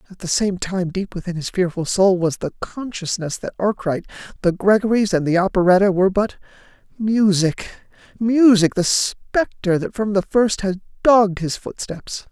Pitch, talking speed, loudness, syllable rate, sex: 195 Hz, 155 wpm, -19 LUFS, 4.7 syllables/s, female